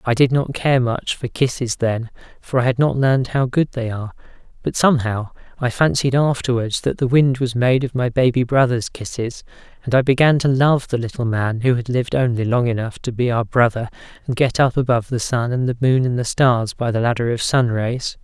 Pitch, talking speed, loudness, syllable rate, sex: 125 Hz, 225 wpm, -19 LUFS, 5.4 syllables/s, male